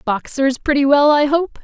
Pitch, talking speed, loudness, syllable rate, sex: 285 Hz, 185 wpm, -15 LUFS, 4.6 syllables/s, female